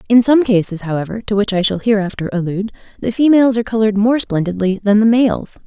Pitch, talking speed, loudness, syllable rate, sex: 210 Hz, 200 wpm, -15 LUFS, 6.5 syllables/s, female